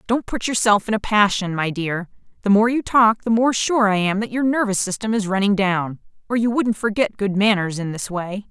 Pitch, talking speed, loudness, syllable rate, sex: 210 Hz, 235 wpm, -19 LUFS, 5.2 syllables/s, female